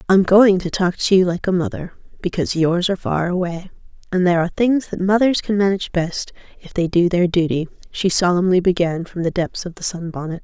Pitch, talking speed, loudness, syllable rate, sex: 180 Hz, 215 wpm, -18 LUFS, 5.8 syllables/s, female